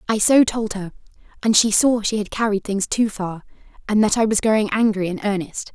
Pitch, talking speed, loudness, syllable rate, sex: 210 Hz, 220 wpm, -19 LUFS, 5.4 syllables/s, female